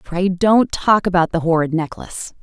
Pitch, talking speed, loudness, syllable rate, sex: 180 Hz, 175 wpm, -17 LUFS, 4.9 syllables/s, female